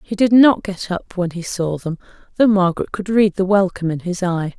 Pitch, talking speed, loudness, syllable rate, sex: 190 Hz, 235 wpm, -18 LUFS, 5.4 syllables/s, female